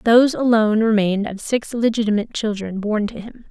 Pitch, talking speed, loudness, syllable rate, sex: 220 Hz, 170 wpm, -19 LUFS, 5.9 syllables/s, female